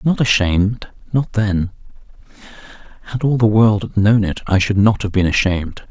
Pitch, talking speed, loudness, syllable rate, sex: 105 Hz, 175 wpm, -16 LUFS, 5.3 syllables/s, male